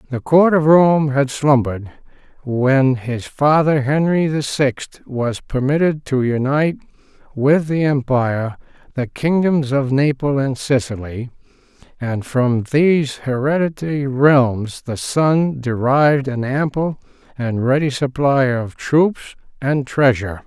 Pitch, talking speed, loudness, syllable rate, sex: 135 Hz, 125 wpm, -17 LUFS, 3.9 syllables/s, male